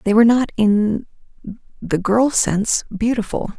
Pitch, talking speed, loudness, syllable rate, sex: 215 Hz, 135 wpm, -18 LUFS, 4.7 syllables/s, female